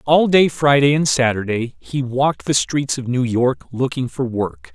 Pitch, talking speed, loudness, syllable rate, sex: 130 Hz, 190 wpm, -18 LUFS, 4.4 syllables/s, male